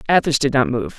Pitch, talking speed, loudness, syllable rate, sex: 145 Hz, 245 wpm, -18 LUFS, 6.3 syllables/s, male